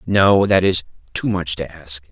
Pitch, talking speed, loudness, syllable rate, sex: 90 Hz, 200 wpm, -18 LUFS, 4.1 syllables/s, male